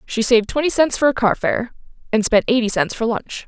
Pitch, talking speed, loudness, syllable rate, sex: 235 Hz, 225 wpm, -18 LUFS, 5.5 syllables/s, female